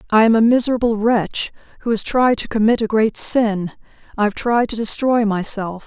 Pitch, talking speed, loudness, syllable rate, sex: 220 Hz, 185 wpm, -17 LUFS, 5.1 syllables/s, female